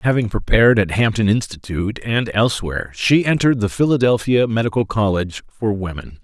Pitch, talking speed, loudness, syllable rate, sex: 110 Hz, 145 wpm, -18 LUFS, 6.0 syllables/s, male